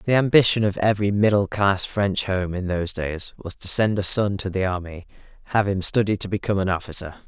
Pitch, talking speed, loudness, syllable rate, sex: 100 Hz, 205 wpm, -22 LUFS, 5.8 syllables/s, male